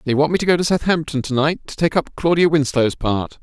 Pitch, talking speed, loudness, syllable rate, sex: 150 Hz, 265 wpm, -18 LUFS, 5.8 syllables/s, male